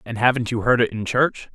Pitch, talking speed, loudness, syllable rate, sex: 115 Hz, 270 wpm, -20 LUFS, 5.8 syllables/s, male